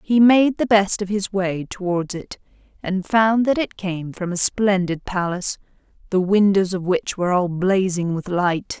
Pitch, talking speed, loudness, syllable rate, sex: 190 Hz, 185 wpm, -20 LUFS, 4.4 syllables/s, female